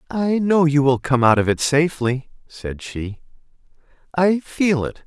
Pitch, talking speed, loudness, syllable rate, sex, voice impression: 145 Hz, 165 wpm, -19 LUFS, 4.3 syllables/s, male, masculine, middle-aged, tensed, hard, fluent, intellectual, mature, wild, lively, strict, sharp